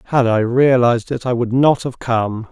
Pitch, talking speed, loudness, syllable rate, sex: 120 Hz, 215 wpm, -16 LUFS, 4.9 syllables/s, male